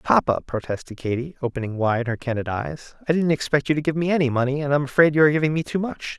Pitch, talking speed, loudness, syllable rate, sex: 140 Hz, 260 wpm, -22 LUFS, 6.9 syllables/s, male